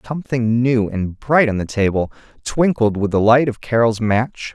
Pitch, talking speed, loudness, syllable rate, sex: 115 Hz, 185 wpm, -17 LUFS, 4.7 syllables/s, male